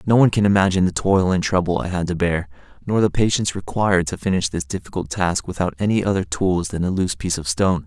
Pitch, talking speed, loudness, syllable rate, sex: 95 Hz, 235 wpm, -20 LUFS, 6.7 syllables/s, male